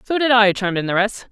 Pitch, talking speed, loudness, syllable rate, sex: 215 Hz, 320 wpm, -17 LUFS, 6.7 syllables/s, female